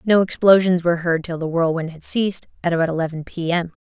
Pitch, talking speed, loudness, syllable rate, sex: 170 Hz, 220 wpm, -20 LUFS, 6.2 syllables/s, female